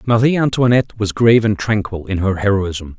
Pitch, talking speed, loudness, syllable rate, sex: 105 Hz, 180 wpm, -16 LUFS, 5.7 syllables/s, male